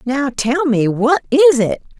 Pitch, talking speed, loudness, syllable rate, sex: 260 Hz, 180 wpm, -15 LUFS, 3.7 syllables/s, female